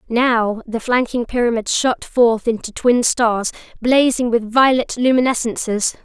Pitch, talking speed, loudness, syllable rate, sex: 235 Hz, 130 wpm, -17 LUFS, 4.2 syllables/s, female